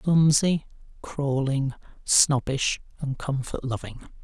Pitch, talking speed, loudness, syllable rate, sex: 140 Hz, 85 wpm, -24 LUFS, 3.4 syllables/s, male